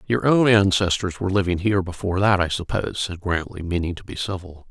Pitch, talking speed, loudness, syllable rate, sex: 95 Hz, 205 wpm, -21 LUFS, 6.2 syllables/s, male